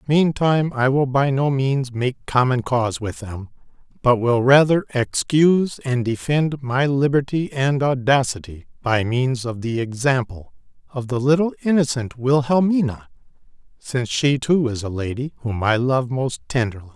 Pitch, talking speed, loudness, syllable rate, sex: 130 Hz, 150 wpm, -20 LUFS, 4.6 syllables/s, male